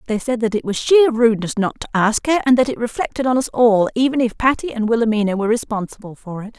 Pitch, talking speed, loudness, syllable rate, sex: 230 Hz, 245 wpm, -17 LUFS, 6.5 syllables/s, female